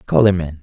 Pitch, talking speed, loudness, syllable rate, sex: 85 Hz, 290 wpm, -15 LUFS, 5.1 syllables/s, male